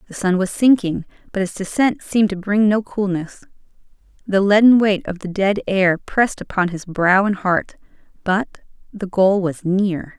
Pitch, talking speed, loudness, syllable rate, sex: 195 Hz, 175 wpm, -18 LUFS, 4.6 syllables/s, female